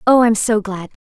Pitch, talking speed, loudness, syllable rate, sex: 220 Hz, 235 wpm, -15 LUFS, 5.1 syllables/s, female